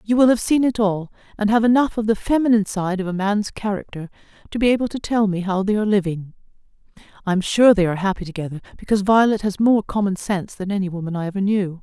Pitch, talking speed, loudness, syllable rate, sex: 205 Hz, 235 wpm, -20 LUFS, 6.7 syllables/s, female